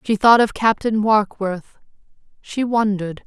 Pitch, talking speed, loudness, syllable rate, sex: 210 Hz, 130 wpm, -18 LUFS, 4.3 syllables/s, female